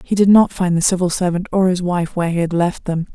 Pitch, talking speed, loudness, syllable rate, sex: 180 Hz, 285 wpm, -17 LUFS, 6.1 syllables/s, female